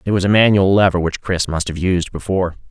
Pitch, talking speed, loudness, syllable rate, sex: 95 Hz, 245 wpm, -16 LUFS, 6.5 syllables/s, male